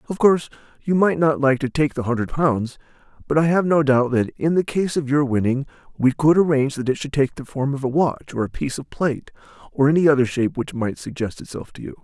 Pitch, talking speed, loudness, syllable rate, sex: 140 Hz, 245 wpm, -20 LUFS, 6.0 syllables/s, male